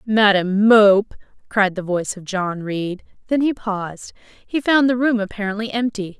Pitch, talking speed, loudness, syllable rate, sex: 210 Hz, 165 wpm, -19 LUFS, 4.5 syllables/s, female